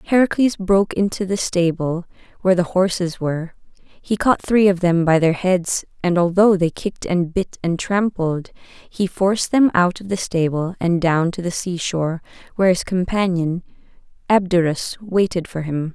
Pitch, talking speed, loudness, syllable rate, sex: 180 Hz, 165 wpm, -19 LUFS, 4.8 syllables/s, female